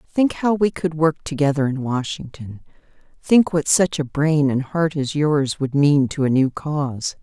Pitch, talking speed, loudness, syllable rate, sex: 150 Hz, 185 wpm, -19 LUFS, 4.4 syllables/s, female